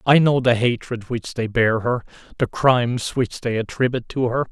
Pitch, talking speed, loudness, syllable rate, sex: 120 Hz, 200 wpm, -21 LUFS, 5.0 syllables/s, male